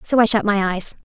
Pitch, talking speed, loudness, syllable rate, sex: 210 Hz, 280 wpm, -18 LUFS, 5.7 syllables/s, female